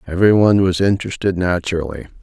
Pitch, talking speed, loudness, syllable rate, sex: 90 Hz, 110 wpm, -16 LUFS, 6.7 syllables/s, male